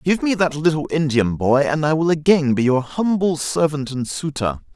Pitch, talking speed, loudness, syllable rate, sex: 150 Hz, 200 wpm, -19 LUFS, 4.9 syllables/s, male